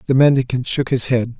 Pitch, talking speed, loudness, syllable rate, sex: 125 Hz, 215 wpm, -17 LUFS, 5.8 syllables/s, male